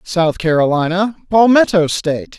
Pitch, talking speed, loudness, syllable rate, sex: 180 Hz, 100 wpm, -14 LUFS, 4.7 syllables/s, male